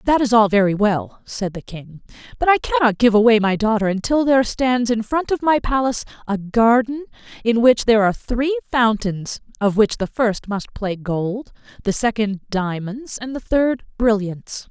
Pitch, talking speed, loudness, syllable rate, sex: 225 Hz, 185 wpm, -19 LUFS, 4.7 syllables/s, female